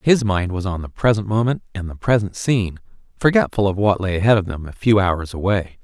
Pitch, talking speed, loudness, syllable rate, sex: 100 Hz, 225 wpm, -19 LUFS, 5.7 syllables/s, male